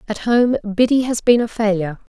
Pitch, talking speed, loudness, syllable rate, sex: 220 Hz, 195 wpm, -17 LUFS, 5.6 syllables/s, female